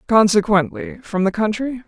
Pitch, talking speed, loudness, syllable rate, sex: 215 Hz, 130 wpm, -18 LUFS, 4.9 syllables/s, female